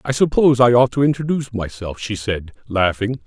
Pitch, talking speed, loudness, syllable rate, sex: 115 Hz, 185 wpm, -18 LUFS, 5.8 syllables/s, male